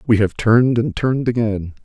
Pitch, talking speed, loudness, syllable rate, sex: 115 Hz, 195 wpm, -17 LUFS, 5.6 syllables/s, male